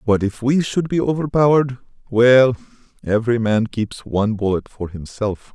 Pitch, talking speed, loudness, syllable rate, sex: 120 Hz, 150 wpm, -18 LUFS, 5.0 syllables/s, male